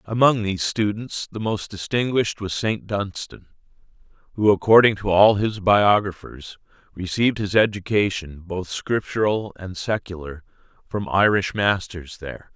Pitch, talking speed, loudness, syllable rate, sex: 100 Hz, 125 wpm, -21 LUFS, 4.6 syllables/s, male